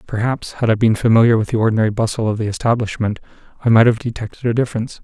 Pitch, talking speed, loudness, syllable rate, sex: 115 Hz, 215 wpm, -17 LUFS, 7.4 syllables/s, male